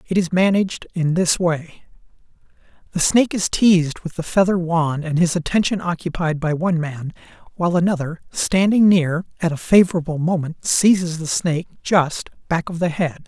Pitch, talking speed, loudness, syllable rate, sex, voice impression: 170 Hz, 165 wpm, -19 LUFS, 5.1 syllables/s, male, very masculine, slightly middle-aged, slightly thick, tensed, powerful, bright, slightly soft, clear, fluent, slightly raspy, cool, very intellectual, refreshing, sincere, calm, slightly mature, slightly friendly, reassuring, unique, slightly elegant, slightly wild, sweet, lively, kind, slightly sharp, modest